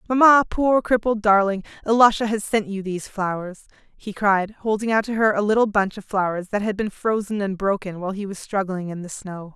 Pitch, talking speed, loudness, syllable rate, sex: 205 Hz, 215 wpm, -21 LUFS, 5.5 syllables/s, female